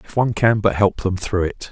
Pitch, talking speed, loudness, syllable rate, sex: 100 Hz, 280 wpm, -19 LUFS, 5.6 syllables/s, male